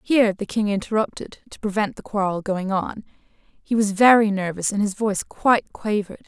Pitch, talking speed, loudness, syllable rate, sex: 205 Hz, 180 wpm, -21 LUFS, 5.2 syllables/s, female